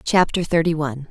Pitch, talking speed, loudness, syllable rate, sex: 160 Hz, 165 wpm, -20 LUFS, 5.9 syllables/s, female